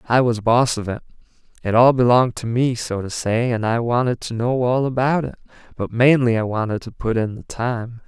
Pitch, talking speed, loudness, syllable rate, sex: 120 Hz, 225 wpm, -19 LUFS, 5.3 syllables/s, male